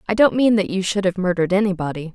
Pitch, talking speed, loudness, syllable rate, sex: 190 Hz, 250 wpm, -19 LUFS, 7.0 syllables/s, female